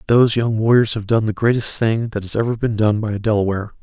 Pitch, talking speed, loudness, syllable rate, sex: 110 Hz, 250 wpm, -18 LUFS, 6.4 syllables/s, male